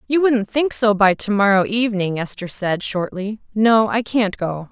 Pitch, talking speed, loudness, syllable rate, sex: 210 Hz, 190 wpm, -18 LUFS, 4.6 syllables/s, female